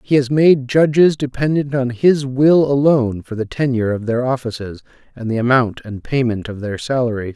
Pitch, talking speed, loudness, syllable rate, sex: 125 Hz, 190 wpm, -17 LUFS, 5.2 syllables/s, male